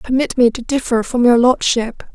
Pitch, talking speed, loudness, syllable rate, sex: 245 Hz, 195 wpm, -15 LUFS, 5.0 syllables/s, female